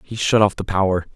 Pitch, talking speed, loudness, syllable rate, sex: 100 Hz, 260 wpm, -19 LUFS, 5.9 syllables/s, male